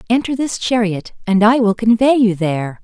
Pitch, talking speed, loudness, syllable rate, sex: 220 Hz, 190 wpm, -15 LUFS, 5.1 syllables/s, female